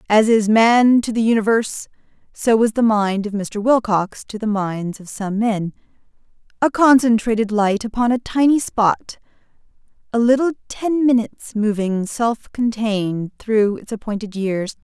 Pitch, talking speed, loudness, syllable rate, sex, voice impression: 220 Hz, 140 wpm, -18 LUFS, 4.5 syllables/s, female, feminine, adult-like, tensed, powerful, slightly bright, soft, clear, intellectual, calm, friendly, reassuring, elegant, lively, slightly sharp